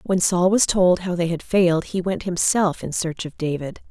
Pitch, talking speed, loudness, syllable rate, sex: 175 Hz, 230 wpm, -21 LUFS, 4.8 syllables/s, female